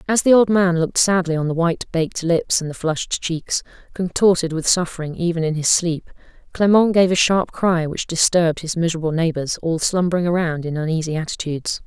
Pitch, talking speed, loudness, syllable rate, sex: 170 Hz, 190 wpm, -19 LUFS, 5.8 syllables/s, female